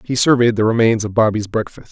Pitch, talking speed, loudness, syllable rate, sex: 115 Hz, 220 wpm, -16 LUFS, 6.2 syllables/s, male